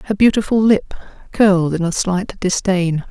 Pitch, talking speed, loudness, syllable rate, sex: 190 Hz, 155 wpm, -16 LUFS, 4.7 syllables/s, female